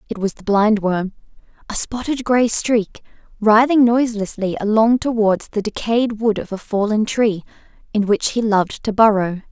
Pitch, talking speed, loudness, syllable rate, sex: 215 Hz, 160 wpm, -18 LUFS, 4.7 syllables/s, female